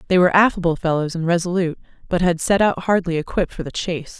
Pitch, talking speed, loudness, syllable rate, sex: 175 Hz, 215 wpm, -19 LUFS, 7.1 syllables/s, female